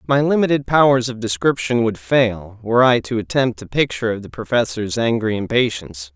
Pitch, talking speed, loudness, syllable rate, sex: 115 Hz, 175 wpm, -18 LUFS, 5.6 syllables/s, male